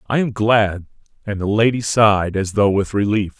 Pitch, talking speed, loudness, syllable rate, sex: 105 Hz, 195 wpm, -17 LUFS, 4.9 syllables/s, male